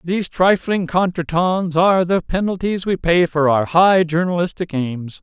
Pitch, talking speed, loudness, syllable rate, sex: 175 Hz, 150 wpm, -17 LUFS, 4.5 syllables/s, male